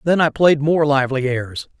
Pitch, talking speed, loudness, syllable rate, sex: 145 Hz, 200 wpm, -17 LUFS, 5.0 syllables/s, male